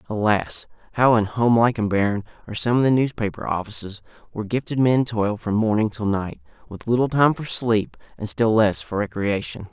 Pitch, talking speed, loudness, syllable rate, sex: 110 Hz, 180 wpm, -21 LUFS, 5.6 syllables/s, male